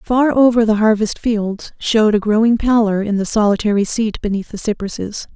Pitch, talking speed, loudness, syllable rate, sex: 215 Hz, 180 wpm, -16 LUFS, 5.3 syllables/s, female